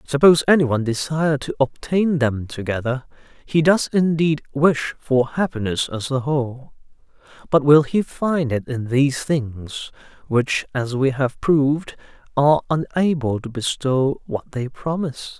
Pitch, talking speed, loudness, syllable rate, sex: 140 Hz, 140 wpm, -20 LUFS, 4.4 syllables/s, male